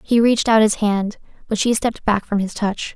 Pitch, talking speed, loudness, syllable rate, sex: 215 Hz, 245 wpm, -18 LUFS, 5.5 syllables/s, female